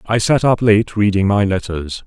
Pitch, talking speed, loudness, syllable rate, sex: 105 Hz, 205 wpm, -15 LUFS, 4.6 syllables/s, male